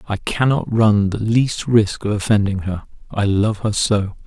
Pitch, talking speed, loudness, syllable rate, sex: 105 Hz, 170 wpm, -18 LUFS, 4.2 syllables/s, male